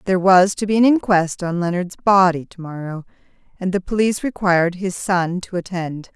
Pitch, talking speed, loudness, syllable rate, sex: 185 Hz, 175 wpm, -18 LUFS, 5.4 syllables/s, female